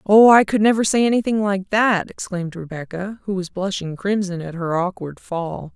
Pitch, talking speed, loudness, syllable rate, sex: 195 Hz, 190 wpm, -19 LUFS, 5.0 syllables/s, female